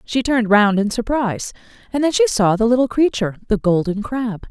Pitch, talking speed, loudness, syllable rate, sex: 225 Hz, 200 wpm, -18 LUFS, 5.7 syllables/s, female